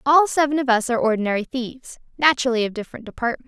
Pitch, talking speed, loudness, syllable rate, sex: 250 Hz, 175 wpm, -20 LUFS, 7.6 syllables/s, female